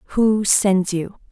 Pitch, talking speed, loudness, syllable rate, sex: 200 Hz, 135 wpm, -18 LUFS, 2.5 syllables/s, female